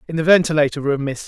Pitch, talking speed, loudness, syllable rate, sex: 150 Hz, 235 wpm, -17 LUFS, 7.2 syllables/s, male